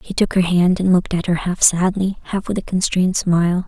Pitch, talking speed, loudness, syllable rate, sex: 180 Hz, 245 wpm, -17 LUFS, 5.8 syllables/s, female